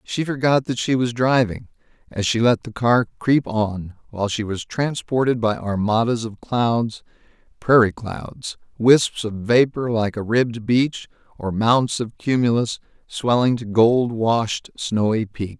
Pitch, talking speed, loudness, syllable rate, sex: 115 Hz, 155 wpm, -20 LUFS, 4.0 syllables/s, male